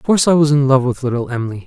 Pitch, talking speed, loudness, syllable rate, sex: 135 Hz, 325 wpm, -15 LUFS, 7.4 syllables/s, male